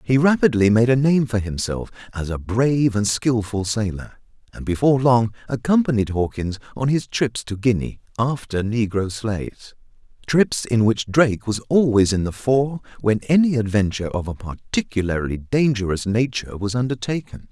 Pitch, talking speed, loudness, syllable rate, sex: 115 Hz, 150 wpm, -20 LUFS, 5.0 syllables/s, male